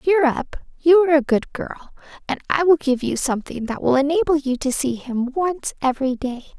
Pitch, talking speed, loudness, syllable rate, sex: 280 Hz, 220 wpm, -20 LUFS, 5.4 syllables/s, female